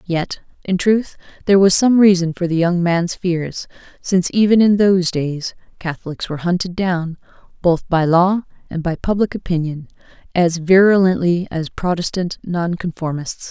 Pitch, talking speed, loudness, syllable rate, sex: 175 Hz, 145 wpm, -17 LUFS, 4.8 syllables/s, female